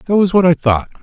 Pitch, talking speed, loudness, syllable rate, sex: 160 Hz, 295 wpm, -13 LUFS, 5.8 syllables/s, male